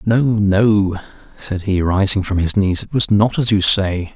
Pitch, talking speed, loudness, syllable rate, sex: 100 Hz, 200 wpm, -16 LUFS, 4.1 syllables/s, male